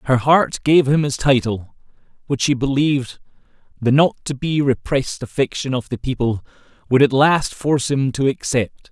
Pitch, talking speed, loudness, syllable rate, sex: 135 Hz, 170 wpm, -18 LUFS, 4.9 syllables/s, male